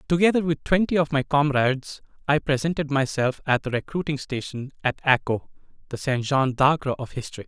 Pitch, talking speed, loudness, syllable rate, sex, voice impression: 140 Hz, 170 wpm, -23 LUFS, 4.7 syllables/s, male, very masculine, very adult-like, slightly old, very thick, tensed, very powerful, bright, slightly hard, clear, fluent, slightly cool, intellectual, slightly refreshing, sincere, calm, slightly mature, friendly, reassuring, slightly unique, slightly elegant, wild, slightly sweet, lively, kind, slightly modest